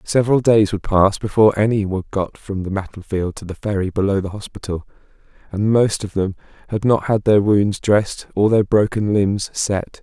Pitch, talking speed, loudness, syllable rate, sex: 100 Hz, 190 wpm, -18 LUFS, 5.3 syllables/s, male